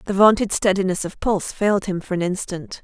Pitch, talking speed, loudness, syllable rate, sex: 195 Hz, 210 wpm, -20 LUFS, 6.0 syllables/s, female